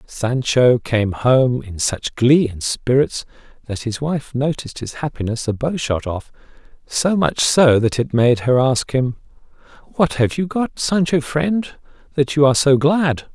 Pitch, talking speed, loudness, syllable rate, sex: 135 Hz, 165 wpm, -18 LUFS, 4.2 syllables/s, male